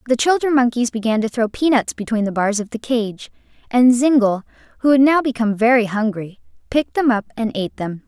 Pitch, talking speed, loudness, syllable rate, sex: 235 Hz, 200 wpm, -18 LUFS, 5.9 syllables/s, female